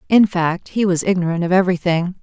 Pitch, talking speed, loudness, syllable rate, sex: 180 Hz, 190 wpm, -17 LUFS, 5.9 syllables/s, female